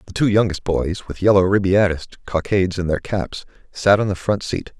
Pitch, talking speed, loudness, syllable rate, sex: 95 Hz, 200 wpm, -19 LUFS, 5.1 syllables/s, male